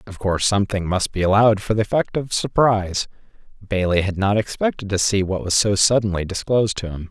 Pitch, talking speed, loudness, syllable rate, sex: 100 Hz, 205 wpm, -20 LUFS, 6.1 syllables/s, male